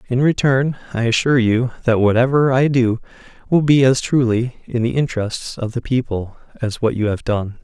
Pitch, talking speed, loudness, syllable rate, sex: 125 Hz, 190 wpm, -18 LUFS, 5.1 syllables/s, male